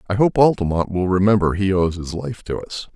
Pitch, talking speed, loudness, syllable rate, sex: 100 Hz, 225 wpm, -19 LUFS, 5.5 syllables/s, male